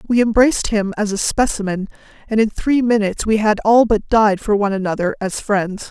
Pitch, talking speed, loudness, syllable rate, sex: 210 Hz, 205 wpm, -17 LUFS, 5.6 syllables/s, female